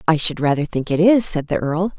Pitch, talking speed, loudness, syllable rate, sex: 160 Hz, 270 wpm, -18 LUFS, 5.6 syllables/s, female